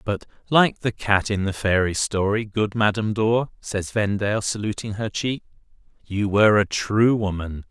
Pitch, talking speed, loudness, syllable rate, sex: 105 Hz, 165 wpm, -22 LUFS, 4.7 syllables/s, male